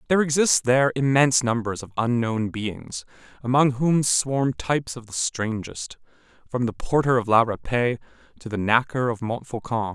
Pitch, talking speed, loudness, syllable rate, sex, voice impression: 120 Hz, 155 wpm, -23 LUFS, 4.9 syllables/s, male, masculine, adult-like, fluent, cool, slightly refreshing, sincere, slightly sweet